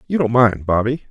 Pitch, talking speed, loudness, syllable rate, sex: 120 Hz, 220 wpm, -17 LUFS, 5.4 syllables/s, male